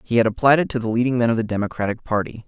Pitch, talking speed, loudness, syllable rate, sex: 115 Hz, 290 wpm, -20 LUFS, 7.6 syllables/s, male